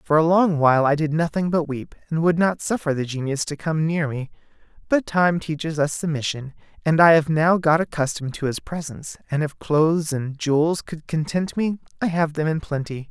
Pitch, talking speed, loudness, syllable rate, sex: 155 Hz, 210 wpm, -22 LUFS, 5.3 syllables/s, male